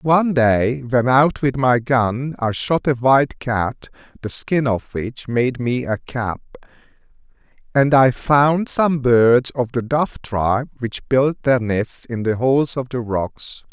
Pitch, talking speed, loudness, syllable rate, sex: 125 Hz, 165 wpm, -18 LUFS, 3.6 syllables/s, male